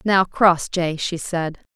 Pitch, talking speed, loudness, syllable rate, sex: 175 Hz, 135 wpm, -20 LUFS, 3.3 syllables/s, female